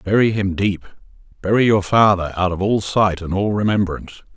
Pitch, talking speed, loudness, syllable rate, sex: 100 Hz, 180 wpm, -18 LUFS, 5.2 syllables/s, male